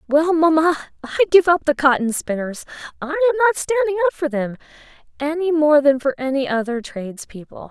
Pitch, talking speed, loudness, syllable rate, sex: 300 Hz, 180 wpm, -18 LUFS, 6.3 syllables/s, female